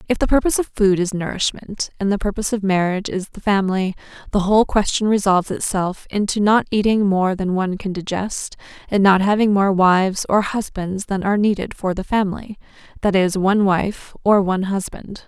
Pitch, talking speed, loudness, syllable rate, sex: 195 Hz, 185 wpm, -19 LUFS, 5.6 syllables/s, female